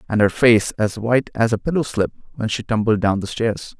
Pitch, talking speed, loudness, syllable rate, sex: 110 Hz, 235 wpm, -19 LUFS, 5.5 syllables/s, male